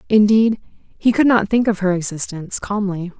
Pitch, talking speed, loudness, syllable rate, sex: 205 Hz, 170 wpm, -18 LUFS, 4.8 syllables/s, female